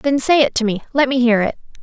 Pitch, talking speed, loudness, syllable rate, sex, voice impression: 250 Hz, 265 wpm, -16 LUFS, 6.2 syllables/s, female, very feminine, young, very thin, tensed, slightly weak, bright, hard, very clear, fluent, cute, intellectual, very refreshing, sincere, calm, very friendly, very reassuring, unique, elegant, slightly wild, sweet, very lively, kind, slightly intense, slightly sharp